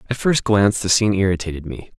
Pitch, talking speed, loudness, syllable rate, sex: 100 Hz, 210 wpm, -18 LUFS, 6.9 syllables/s, male